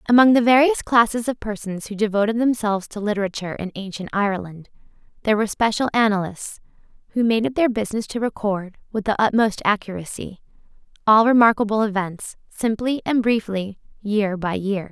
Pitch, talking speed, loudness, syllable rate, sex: 215 Hz, 155 wpm, -20 LUFS, 5.8 syllables/s, female